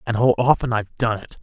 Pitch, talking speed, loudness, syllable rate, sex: 115 Hz, 250 wpm, -20 LUFS, 6.4 syllables/s, male